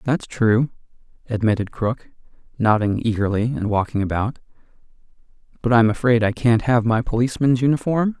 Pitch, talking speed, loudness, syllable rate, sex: 115 Hz, 130 wpm, -20 LUFS, 5.3 syllables/s, male